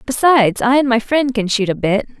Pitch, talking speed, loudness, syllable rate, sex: 240 Hz, 245 wpm, -15 LUFS, 5.5 syllables/s, female